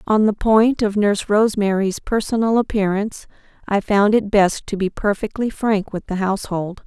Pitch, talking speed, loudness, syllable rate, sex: 205 Hz, 165 wpm, -19 LUFS, 5.1 syllables/s, female